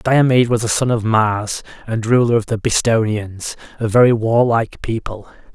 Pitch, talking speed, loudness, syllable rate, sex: 115 Hz, 160 wpm, -17 LUFS, 5.0 syllables/s, male